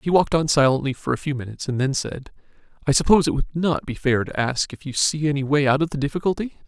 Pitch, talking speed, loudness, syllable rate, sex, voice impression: 145 Hz, 260 wpm, -22 LUFS, 6.8 syllables/s, male, masculine, adult-like, fluent, refreshing, slightly sincere, slightly reassuring